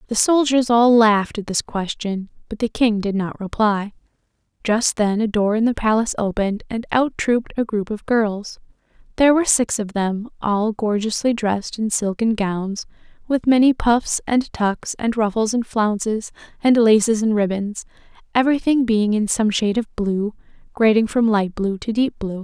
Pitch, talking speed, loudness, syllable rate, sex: 220 Hz, 175 wpm, -19 LUFS, 4.8 syllables/s, female